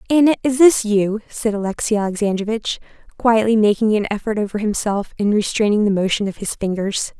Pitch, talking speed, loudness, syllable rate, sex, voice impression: 215 Hz, 165 wpm, -18 LUFS, 5.7 syllables/s, female, very feminine, slightly young, slightly adult-like, very thin, slightly tensed, slightly powerful, slightly bright, hard, very clear, very fluent, cute, slightly cool, very intellectual, very refreshing, sincere, very calm, friendly, reassuring, unique, elegant, very sweet, slightly strict, slightly sharp